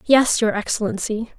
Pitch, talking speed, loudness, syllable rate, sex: 225 Hz, 130 wpm, -20 LUFS, 4.7 syllables/s, female